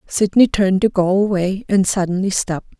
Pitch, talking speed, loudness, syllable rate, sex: 195 Hz, 150 wpm, -17 LUFS, 5.4 syllables/s, female